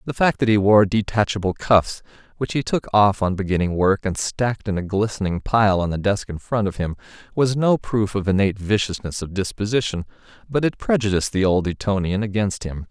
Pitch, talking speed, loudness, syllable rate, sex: 105 Hz, 200 wpm, -21 LUFS, 5.6 syllables/s, male